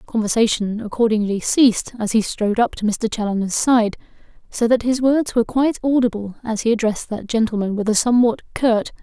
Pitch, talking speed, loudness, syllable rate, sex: 225 Hz, 180 wpm, -19 LUFS, 5.8 syllables/s, female